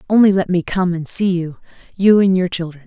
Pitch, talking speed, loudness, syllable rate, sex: 180 Hz, 210 wpm, -16 LUFS, 5.5 syllables/s, female